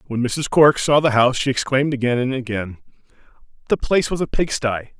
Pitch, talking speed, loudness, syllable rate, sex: 130 Hz, 190 wpm, -19 LUFS, 6.0 syllables/s, male